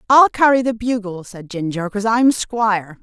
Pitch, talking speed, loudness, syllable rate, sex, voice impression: 215 Hz, 180 wpm, -17 LUFS, 5.0 syllables/s, female, feminine, middle-aged, tensed, slightly powerful, slightly hard, slightly muffled, intellectual, calm, friendly, elegant, slightly sharp